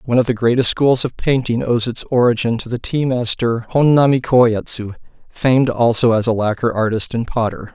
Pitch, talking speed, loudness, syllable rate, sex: 120 Hz, 185 wpm, -16 LUFS, 5.2 syllables/s, male